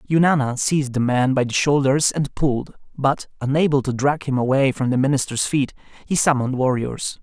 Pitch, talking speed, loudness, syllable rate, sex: 135 Hz, 185 wpm, -20 LUFS, 5.3 syllables/s, male